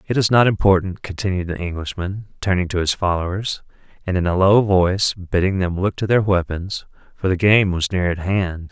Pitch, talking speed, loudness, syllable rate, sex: 95 Hz, 200 wpm, -19 LUFS, 5.3 syllables/s, male